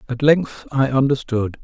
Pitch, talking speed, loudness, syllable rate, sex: 135 Hz, 145 wpm, -19 LUFS, 4.3 syllables/s, male